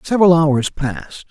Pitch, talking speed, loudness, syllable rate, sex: 160 Hz, 140 wpm, -15 LUFS, 5.1 syllables/s, male